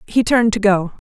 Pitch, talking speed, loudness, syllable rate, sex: 210 Hz, 225 wpm, -16 LUFS, 6.2 syllables/s, female